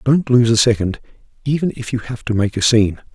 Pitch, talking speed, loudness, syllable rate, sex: 115 Hz, 230 wpm, -17 LUFS, 6.1 syllables/s, male